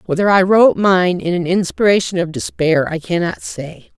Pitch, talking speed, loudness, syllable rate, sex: 180 Hz, 180 wpm, -15 LUFS, 5.0 syllables/s, female